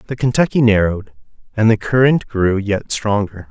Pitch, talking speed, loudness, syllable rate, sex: 110 Hz, 155 wpm, -16 LUFS, 5.1 syllables/s, male